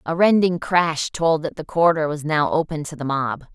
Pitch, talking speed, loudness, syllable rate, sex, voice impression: 155 Hz, 220 wpm, -20 LUFS, 5.0 syllables/s, female, feminine, adult-like, tensed, powerful, clear, nasal, intellectual, calm, lively, sharp